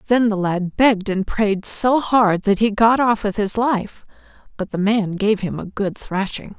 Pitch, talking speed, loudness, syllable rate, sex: 210 Hz, 210 wpm, -19 LUFS, 4.3 syllables/s, female